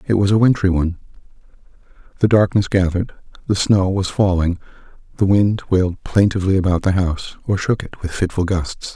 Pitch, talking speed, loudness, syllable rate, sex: 95 Hz, 165 wpm, -18 LUFS, 5.9 syllables/s, male